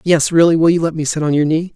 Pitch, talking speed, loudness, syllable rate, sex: 160 Hz, 340 wpm, -14 LUFS, 6.7 syllables/s, male